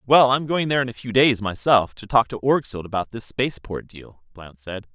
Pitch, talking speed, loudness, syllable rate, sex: 115 Hz, 230 wpm, -21 LUFS, 5.3 syllables/s, male